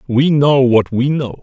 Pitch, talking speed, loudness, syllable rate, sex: 130 Hz, 210 wpm, -13 LUFS, 3.9 syllables/s, male